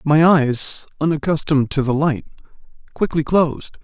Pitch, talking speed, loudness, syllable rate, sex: 150 Hz, 125 wpm, -18 LUFS, 4.9 syllables/s, male